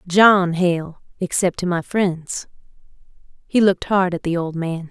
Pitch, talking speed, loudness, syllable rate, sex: 180 Hz, 160 wpm, -19 LUFS, 4.1 syllables/s, female